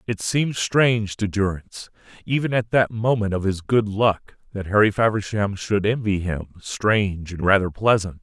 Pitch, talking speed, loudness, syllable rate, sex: 105 Hz, 160 wpm, -21 LUFS, 4.9 syllables/s, male